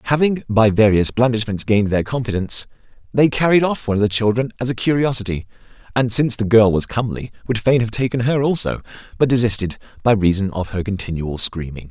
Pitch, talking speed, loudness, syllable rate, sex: 115 Hz, 185 wpm, -18 LUFS, 6.2 syllables/s, male